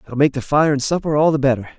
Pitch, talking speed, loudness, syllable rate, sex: 140 Hz, 305 wpm, -17 LUFS, 6.8 syllables/s, male